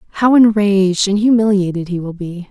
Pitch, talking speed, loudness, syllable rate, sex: 200 Hz, 170 wpm, -14 LUFS, 5.7 syllables/s, female